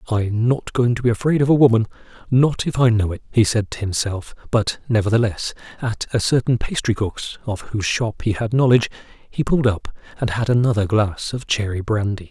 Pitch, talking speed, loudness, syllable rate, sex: 115 Hz, 190 wpm, -20 LUFS, 5.4 syllables/s, male